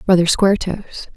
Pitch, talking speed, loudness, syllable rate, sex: 185 Hz, 155 wpm, -16 LUFS, 7.3 syllables/s, female